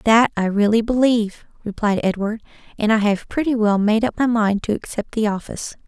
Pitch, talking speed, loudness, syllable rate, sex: 220 Hz, 195 wpm, -19 LUFS, 5.6 syllables/s, female